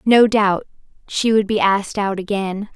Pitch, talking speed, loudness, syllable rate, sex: 205 Hz, 175 wpm, -18 LUFS, 4.6 syllables/s, female